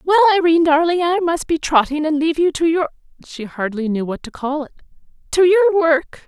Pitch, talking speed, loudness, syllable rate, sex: 320 Hz, 210 wpm, -17 LUFS, 5.6 syllables/s, female